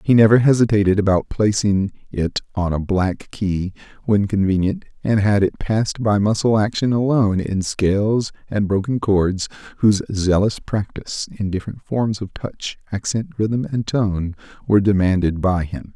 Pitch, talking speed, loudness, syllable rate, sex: 105 Hz, 155 wpm, -19 LUFS, 4.8 syllables/s, male